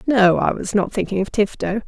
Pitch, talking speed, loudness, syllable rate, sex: 205 Hz, 190 wpm, -19 LUFS, 5.3 syllables/s, female